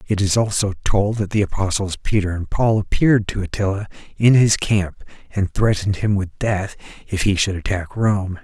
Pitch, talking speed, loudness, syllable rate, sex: 100 Hz, 185 wpm, -20 LUFS, 5.1 syllables/s, male